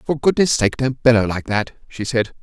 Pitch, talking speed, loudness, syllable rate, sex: 125 Hz, 225 wpm, -18 LUFS, 5.1 syllables/s, male